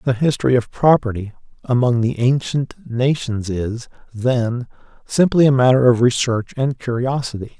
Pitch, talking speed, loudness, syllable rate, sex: 125 Hz, 135 wpm, -18 LUFS, 4.7 syllables/s, male